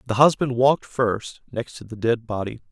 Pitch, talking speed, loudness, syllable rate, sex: 120 Hz, 200 wpm, -22 LUFS, 5.2 syllables/s, male